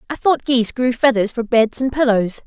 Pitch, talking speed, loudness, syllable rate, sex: 240 Hz, 220 wpm, -17 LUFS, 5.3 syllables/s, female